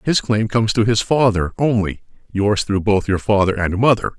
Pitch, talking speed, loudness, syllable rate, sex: 105 Hz, 185 wpm, -17 LUFS, 5.1 syllables/s, male